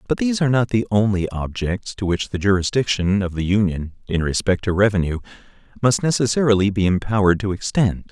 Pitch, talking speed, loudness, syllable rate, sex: 105 Hz, 175 wpm, -20 LUFS, 6.1 syllables/s, male